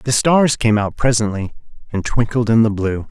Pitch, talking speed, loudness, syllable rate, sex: 115 Hz, 195 wpm, -17 LUFS, 4.8 syllables/s, male